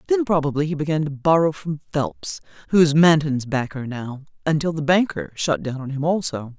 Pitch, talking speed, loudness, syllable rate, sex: 150 Hz, 180 wpm, -21 LUFS, 5.0 syllables/s, female